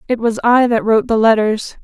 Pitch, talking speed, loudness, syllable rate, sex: 230 Hz, 230 wpm, -14 LUFS, 5.7 syllables/s, female